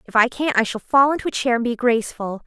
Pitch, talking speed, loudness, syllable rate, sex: 240 Hz, 290 wpm, -20 LUFS, 6.5 syllables/s, female